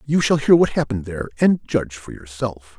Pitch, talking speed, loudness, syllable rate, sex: 120 Hz, 215 wpm, -19 LUFS, 5.9 syllables/s, male